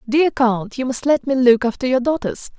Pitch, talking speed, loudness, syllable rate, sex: 255 Hz, 230 wpm, -18 LUFS, 5.0 syllables/s, female